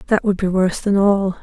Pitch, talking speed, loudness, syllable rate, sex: 195 Hz, 255 wpm, -17 LUFS, 5.9 syllables/s, female